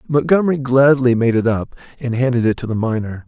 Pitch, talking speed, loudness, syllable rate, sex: 125 Hz, 200 wpm, -16 LUFS, 5.9 syllables/s, male